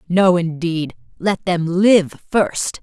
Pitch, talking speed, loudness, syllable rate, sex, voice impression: 175 Hz, 130 wpm, -17 LUFS, 2.9 syllables/s, female, feminine, adult-like, slightly clear, sincere, friendly, slightly kind